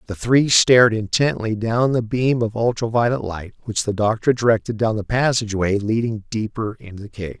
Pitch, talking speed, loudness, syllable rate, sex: 110 Hz, 185 wpm, -19 LUFS, 5.3 syllables/s, male